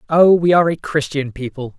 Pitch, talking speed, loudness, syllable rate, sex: 150 Hz, 200 wpm, -16 LUFS, 5.7 syllables/s, male